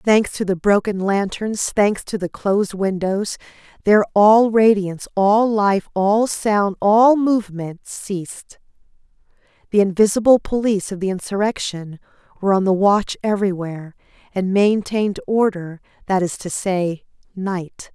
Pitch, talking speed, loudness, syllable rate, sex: 200 Hz, 130 wpm, -18 LUFS, 4.5 syllables/s, female